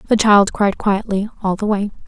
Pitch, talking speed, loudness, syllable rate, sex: 205 Hz, 200 wpm, -17 LUFS, 4.6 syllables/s, female